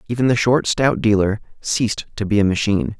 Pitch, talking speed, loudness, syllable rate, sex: 110 Hz, 200 wpm, -18 LUFS, 6.0 syllables/s, male